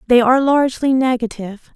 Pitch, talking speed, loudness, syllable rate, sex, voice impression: 250 Hz, 135 wpm, -15 LUFS, 6.3 syllables/s, female, very feminine, slightly young, slightly adult-like, very thin, relaxed, slightly weak, slightly bright, very soft, clear, fluent, slightly raspy, very cute, intellectual, very refreshing, very sincere, very calm, very friendly, very reassuring, very unique, very elegant, very sweet, lively, very kind, modest